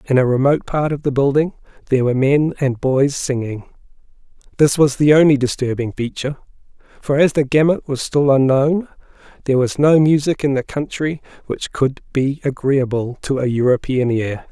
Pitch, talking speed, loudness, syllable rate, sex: 135 Hz, 170 wpm, -17 LUFS, 5.3 syllables/s, male